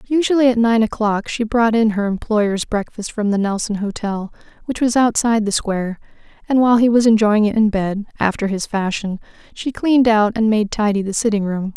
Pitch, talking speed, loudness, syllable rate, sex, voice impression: 215 Hz, 200 wpm, -17 LUFS, 5.4 syllables/s, female, very feminine, young, very thin, tensed, slightly weak, bright, soft, clear, fluent, slightly raspy, very cute, intellectual, very refreshing, sincere, calm, very friendly, very reassuring, unique, very elegant, slightly wild, very sweet, slightly lively, very kind, modest, light